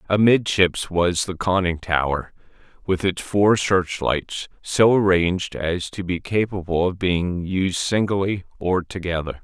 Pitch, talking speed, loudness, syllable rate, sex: 90 Hz, 135 wpm, -21 LUFS, 3.9 syllables/s, male